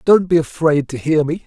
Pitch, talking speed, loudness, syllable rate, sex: 155 Hz, 245 wpm, -16 LUFS, 5.1 syllables/s, male